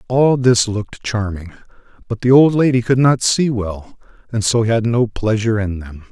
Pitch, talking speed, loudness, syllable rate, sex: 115 Hz, 185 wpm, -16 LUFS, 4.8 syllables/s, male